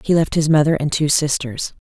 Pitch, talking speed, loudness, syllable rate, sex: 155 Hz, 230 wpm, -17 LUFS, 5.4 syllables/s, female